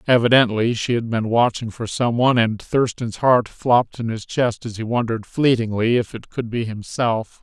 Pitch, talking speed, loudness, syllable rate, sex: 115 Hz, 195 wpm, -20 LUFS, 5.0 syllables/s, male